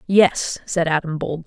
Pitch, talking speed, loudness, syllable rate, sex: 170 Hz, 165 wpm, -20 LUFS, 4.6 syllables/s, female